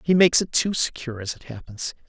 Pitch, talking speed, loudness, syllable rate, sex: 145 Hz, 230 wpm, -22 LUFS, 6.4 syllables/s, male